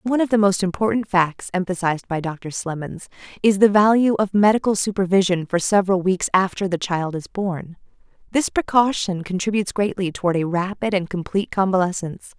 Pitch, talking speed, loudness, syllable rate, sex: 190 Hz, 165 wpm, -20 LUFS, 5.8 syllables/s, female